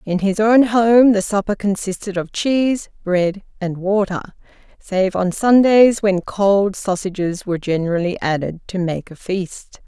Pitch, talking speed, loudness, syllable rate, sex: 195 Hz, 150 wpm, -17 LUFS, 4.3 syllables/s, female